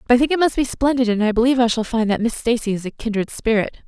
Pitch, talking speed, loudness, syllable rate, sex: 235 Hz, 310 wpm, -19 LUFS, 7.2 syllables/s, female